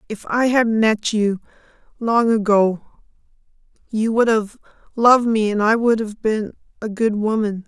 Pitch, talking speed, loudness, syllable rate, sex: 220 Hz, 115 wpm, -18 LUFS, 4.3 syllables/s, female